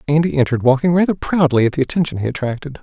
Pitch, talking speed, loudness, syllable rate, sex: 140 Hz, 215 wpm, -17 LUFS, 7.6 syllables/s, male